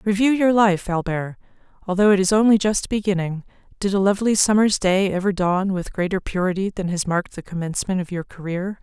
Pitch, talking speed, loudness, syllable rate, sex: 190 Hz, 190 wpm, -20 LUFS, 5.9 syllables/s, female